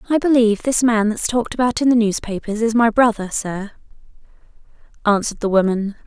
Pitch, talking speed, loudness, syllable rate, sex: 220 Hz, 170 wpm, -18 LUFS, 6.0 syllables/s, female